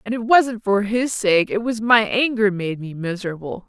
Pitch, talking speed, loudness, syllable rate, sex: 210 Hz, 210 wpm, -19 LUFS, 4.8 syllables/s, female